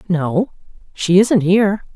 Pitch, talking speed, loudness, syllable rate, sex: 190 Hz, 125 wpm, -15 LUFS, 3.8 syllables/s, female